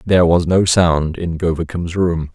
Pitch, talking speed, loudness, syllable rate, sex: 85 Hz, 180 wpm, -16 LUFS, 4.5 syllables/s, male